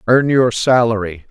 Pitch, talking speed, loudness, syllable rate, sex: 115 Hz, 140 wpm, -14 LUFS, 4.4 syllables/s, male